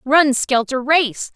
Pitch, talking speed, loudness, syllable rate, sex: 270 Hz, 135 wpm, -17 LUFS, 3.2 syllables/s, female